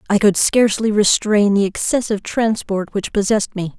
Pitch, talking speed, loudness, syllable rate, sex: 205 Hz, 160 wpm, -17 LUFS, 5.3 syllables/s, female